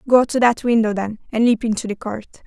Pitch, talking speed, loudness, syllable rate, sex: 225 Hz, 245 wpm, -19 LUFS, 5.9 syllables/s, female